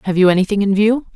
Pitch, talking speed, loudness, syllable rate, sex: 200 Hz, 260 wpm, -15 LUFS, 7.4 syllables/s, female